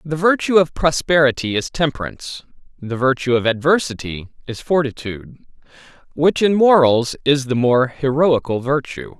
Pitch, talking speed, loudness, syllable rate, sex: 140 Hz, 130 wpm, -17 LUFS, 4.8 syllables/s, male